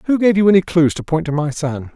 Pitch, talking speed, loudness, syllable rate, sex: 165 Hz, 305 wpm, -16 LUFS, 6.2 syllables/s, male